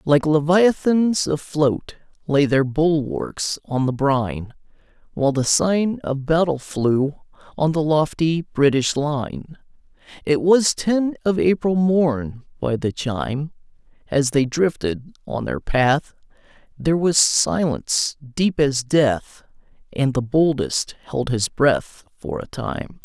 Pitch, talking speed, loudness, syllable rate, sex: 150 Hz, 130 wpm, -20 LUFS, 3.5 syllables/s, male